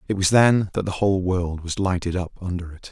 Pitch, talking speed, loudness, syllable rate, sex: 95 Hz, 245 wpm, -22 LUFS, 5.6 syllables/s, male